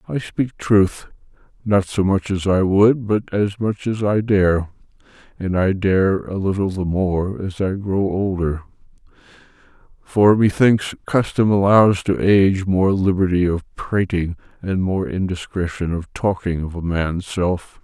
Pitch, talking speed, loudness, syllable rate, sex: 95 Hz, 150 wpm, -19 LUFS, 4.0 syllables/s, male